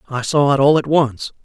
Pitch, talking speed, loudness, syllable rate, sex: 140 Hz, 250 wpm, -16 LUFS, 5.2 syllables/s, male